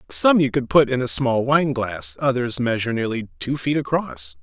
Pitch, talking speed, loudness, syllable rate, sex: 125 Hz, 190 wpm, -20 LUFS, 5.2 syllables/s, male